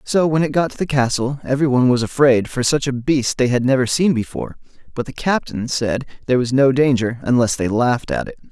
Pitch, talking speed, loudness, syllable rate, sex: 130 Hz, 230 wpm, -18 LUFS, 6.0 syllables/s, male